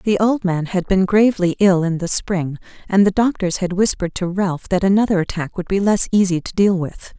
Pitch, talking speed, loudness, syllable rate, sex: 190 Hz, 225 wpm, -18 LUFS, 5.3 syllables/s, female